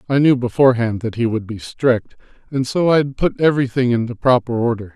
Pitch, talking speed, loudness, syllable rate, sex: 125 Hz, 205 wpm, -17 LUFS, 5.9 syllables/s, male